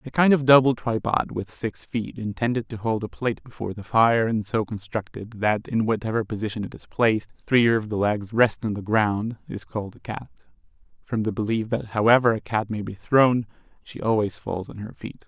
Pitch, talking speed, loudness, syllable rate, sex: 110 Hz, 210 wpm, -24 LUFS, 5.3 syllables/s, male